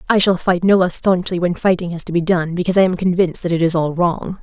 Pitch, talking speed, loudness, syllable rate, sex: 175 Hz, 285 wpm, -16 LUFS, 6.4 syllables/s, female